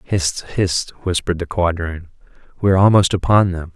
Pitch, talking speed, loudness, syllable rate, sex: 90 Hz, 160 wpm, -18 LUFS, 5.4 syllables/s, male